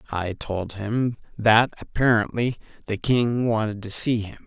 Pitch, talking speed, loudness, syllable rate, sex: 110 Hz, 150 wpm, -23 LUFS, 4.1 syllables/s, male